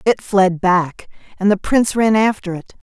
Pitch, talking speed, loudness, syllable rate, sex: 195 Hz, 185 wpm, -16 LUFS, 4.6 syllables/s, female